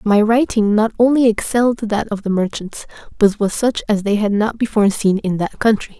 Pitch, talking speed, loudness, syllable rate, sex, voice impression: 215 Hz, 210 wpm, -16 LUFS, 5.3 syllables/s, female, feminine, adult-like, slightly soft, slightly fluent, sincere, friendly, slightly reassuring